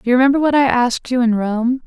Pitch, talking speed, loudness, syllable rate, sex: 250 Hz, 290 wpm, -16 LUFS, 6.6 syllables/s, female